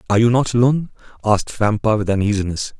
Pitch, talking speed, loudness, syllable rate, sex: 110 Hz, 170 wpm, -18 LUFS, 7.1 syllables/s, male